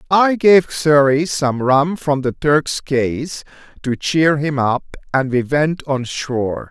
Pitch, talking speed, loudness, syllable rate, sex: 145 Hz, 160 wpm, -17 LUFS, 3.4 syllables/s, male